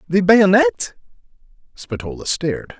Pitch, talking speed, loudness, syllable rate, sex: 165 Hz, 85 wpm, -17 LUFS, 5.2 syllables/s, male